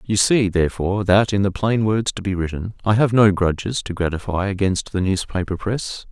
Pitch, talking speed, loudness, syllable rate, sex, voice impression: 100 Hz, 205 wpm, -20 LUFS, 5.3 syllables/s, male, very masculine, middle-aged, very thick, very tensed, very powerful, dark, soft, muffled, slightly fluent, raspy, very cool, very intellectual, sincere, very calm, very mature, very friendly, reassuring, very unique, very elegant, wild, sweet, slightly lively, kind, modest